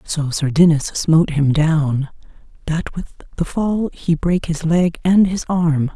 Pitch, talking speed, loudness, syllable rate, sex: 160 Hz, 170 wpm, -17 LUFS, 4.1 syllables/s, female